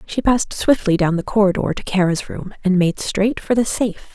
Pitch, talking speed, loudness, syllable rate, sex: 200 Hz, 215 wpm, -18 LUFS, 5.4 syllables/s, female